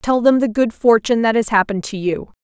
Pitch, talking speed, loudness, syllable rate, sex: 225 Hz, 245 wpm, -16 LUFS, 6.0 syllables/s, female